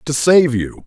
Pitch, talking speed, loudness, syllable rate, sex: 140 Hz, 210 wpm, -14 LUFS, 3.9 syllables/s, male